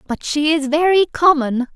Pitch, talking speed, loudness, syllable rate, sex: 300 Hz, 170 wpm, -16 LUFS, 4.6 syllables/s, female